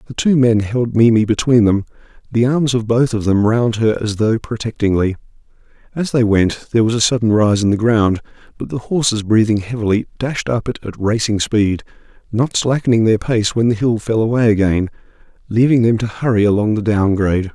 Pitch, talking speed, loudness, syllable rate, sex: 110 Hz, 195 wpm, -16 LUFS, 5.4 syllables/s, male